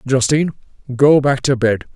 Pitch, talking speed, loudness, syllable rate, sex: 130 Hz, 155 wpm, -15 LUFS, 5.5 syllables/s, male